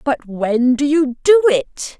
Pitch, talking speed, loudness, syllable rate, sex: 280 Hz, 180 wpm, -15 LUFS, 3.2 syllables/s, female